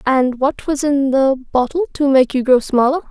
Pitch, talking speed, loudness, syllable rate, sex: 270 Hz, 215 wpm, -16 LUFS, 4.6 syllables/s, female